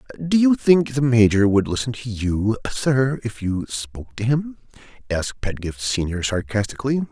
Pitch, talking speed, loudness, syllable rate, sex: 115 Hz, 160 wpm, -21 LUFS, 4.9 syllables/s, male